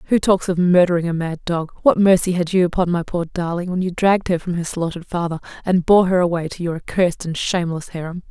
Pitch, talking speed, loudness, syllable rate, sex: 175 Hz, 240 wpm, -19 LUFS, 6.3 syllables/s, female